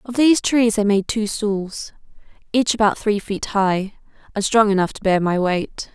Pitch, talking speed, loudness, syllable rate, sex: 210 Hz, 190 wpm, -19 LUFS, 4.6 syllables/s, female